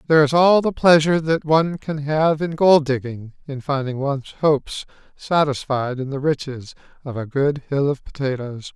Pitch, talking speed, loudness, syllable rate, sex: 145 Hz, 180 wpm, -19 LUFS, 5.1 syllables/s, male